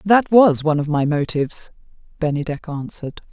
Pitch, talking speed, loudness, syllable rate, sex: 160 Hz, 145 wpm, -18 LUFS, 5.8 syllables/s, female